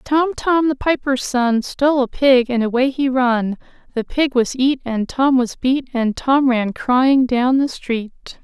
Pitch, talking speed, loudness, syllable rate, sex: 255 Hz, 190 wpm, -17 LUFS, 4.0 syllables/s, female